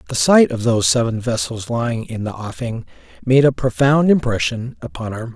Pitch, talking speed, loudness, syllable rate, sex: 120 Hz, 190 wpm, -18 LUFS, 5.5 syllables/s, male